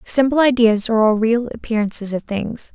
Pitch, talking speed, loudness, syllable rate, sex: 230 Hz, 175 wpm, -17 LUFS, 5.4 syllables/s, female